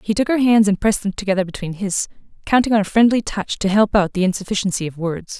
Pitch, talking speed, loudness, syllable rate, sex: 200 Hz, 245 wpm, -18 LUFS, 6.5 syllables/s, female